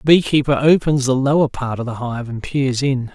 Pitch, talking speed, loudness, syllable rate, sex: 135 Hz, 230 wpm, -18 LUFS, 5.4 syllables/s, male